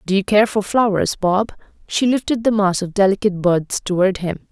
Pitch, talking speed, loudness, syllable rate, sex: 200 Hz, 200 wpm, -18 LUFS, 5.2 syllables/s, female